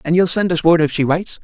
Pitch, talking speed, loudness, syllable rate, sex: 170 Hz, 335 wpm, -16 LUFS, 6.8 syllables/s, male